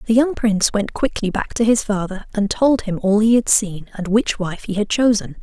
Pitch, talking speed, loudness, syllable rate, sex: 215 Hz, 245 wpm, -18 LUFS, 5.1 syllables/s, female